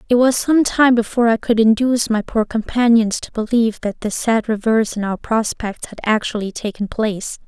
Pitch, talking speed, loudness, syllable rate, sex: 225 Hz, 195 wpm, -17 LUFS, 5.4 syllables/s, female